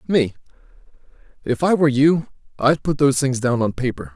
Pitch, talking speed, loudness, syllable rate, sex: 135 Hz, 175 wpm, -19 LUFS, 5.6 syllables/s, male